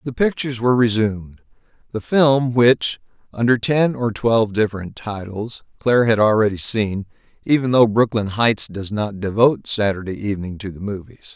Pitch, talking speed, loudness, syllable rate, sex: 110 Hz, 155 wpm, -19 LUFS, 5.2 syllables/s, male